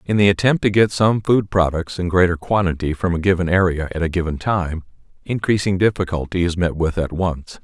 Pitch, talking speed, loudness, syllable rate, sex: 90 Hz, 205 wpm, -19 LUFS, 5.5 syllables/s, male